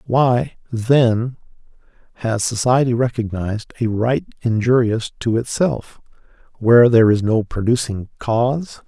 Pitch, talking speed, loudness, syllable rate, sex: 120 Hz, 110 wpm, -18 LUFS, 4.3 syllables/s, male